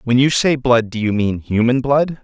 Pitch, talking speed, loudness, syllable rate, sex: 125 Hz, 240 wpm, -16 LUFS, 4.7 syllables/s, male